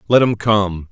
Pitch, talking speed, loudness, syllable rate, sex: 105 Hz, 195 wpm, -16 LUFS, 4.1 syllables/s, male